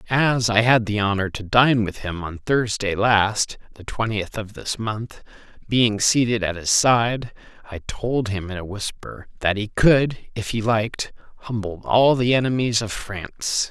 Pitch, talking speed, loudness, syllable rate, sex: 110 Hz, 175 wpm, -21 LUFS, 4.2 syllables/s, male